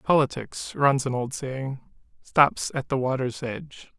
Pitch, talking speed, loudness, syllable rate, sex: 135 Hz, 150 wpm, -25 LUFS, 4.1 syllables/s, male